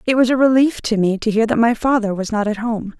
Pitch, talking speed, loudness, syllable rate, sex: 225 Hz, 300 wpm, -17 LUFS, 6.0 syllables/s, female